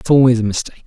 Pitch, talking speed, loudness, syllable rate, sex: 120 Hz, 280 wpm, -15 LUFS, 8.4 syllables/s, male